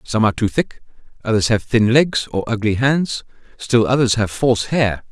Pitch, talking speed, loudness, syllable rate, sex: 115 Hz, 190 wpm, -17 LUFS, 4.9 syllables/s, male